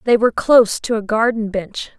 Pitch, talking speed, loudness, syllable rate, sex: 220 Hz, 210 wpm, -16 LUFS, 5.5 syllables/s, female